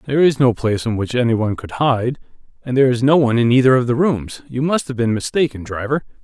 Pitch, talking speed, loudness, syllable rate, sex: 125 Hz, 230 wpm, -17 LUFS, 6.5 syllables/s, male